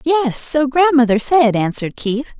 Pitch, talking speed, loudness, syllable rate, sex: 265 Hz, 150 wpm, -15 LUFS, 4.4 syllables/s, female